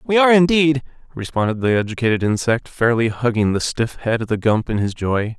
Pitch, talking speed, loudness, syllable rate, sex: 120 Hz, 200 wpm, -18 LUFS, 5.7 syllables/s, male